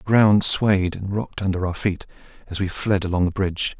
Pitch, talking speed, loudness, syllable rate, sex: 95 Hz, 220 wpm, -21 LUFS, 5.4 syllables/s, male